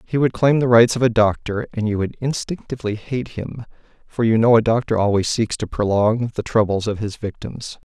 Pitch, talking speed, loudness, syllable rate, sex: 115 Hz, 210 wpm, -19 LUFS, 5.4 syllables/s, male